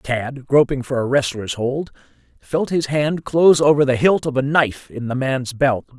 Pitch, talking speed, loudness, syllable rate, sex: 135 Hz, 200 wpm, -18 LUFS, 4.7 syllables/s, male